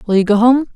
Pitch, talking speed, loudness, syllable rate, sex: 230 Hz, 320 wpm, -12 LUFS, 6.7 syllables/s, female